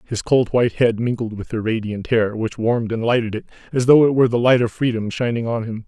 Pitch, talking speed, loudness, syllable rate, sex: 115 Hz, 255 wpm, -19 LUFS, 6.1 syllables/s, male